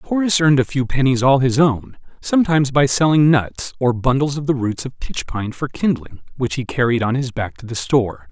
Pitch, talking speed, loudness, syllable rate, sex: 130 Hz, 225 wpm, -18 LUFS, 5.5 syllables/s, male